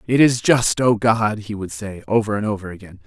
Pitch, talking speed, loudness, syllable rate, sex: 105 Hz, 235 wpm, -19 LUFS, 5.3 syllables/s, male